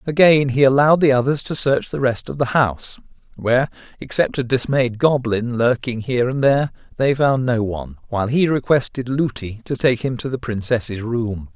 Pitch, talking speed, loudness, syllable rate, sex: 125 Hz, 175 wpm, -19 LUFS, 5.3 syllables/s, male